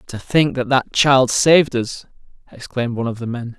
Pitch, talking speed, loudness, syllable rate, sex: 130 Hz, 200 wpm, -17 LUFS, 5.3 syllables/s, male